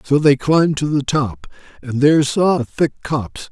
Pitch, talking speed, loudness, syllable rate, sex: 145 Hz, 205 wpm, -17 LUFS, 4.9 syllables/s, male